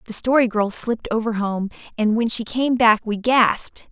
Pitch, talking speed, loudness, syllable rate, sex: 230 Hz, 200 wpm, -19 LUFS, 4.9 syllables/s, female